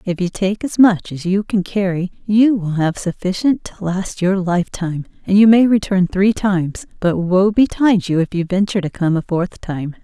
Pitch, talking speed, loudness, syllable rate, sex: 190 Hz, 210 wpm, -17 LUFS, 5.0 syllables/s, female